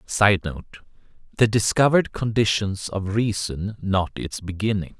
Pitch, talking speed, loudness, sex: 105 Hz, 110 wpm, -22 LUFS, male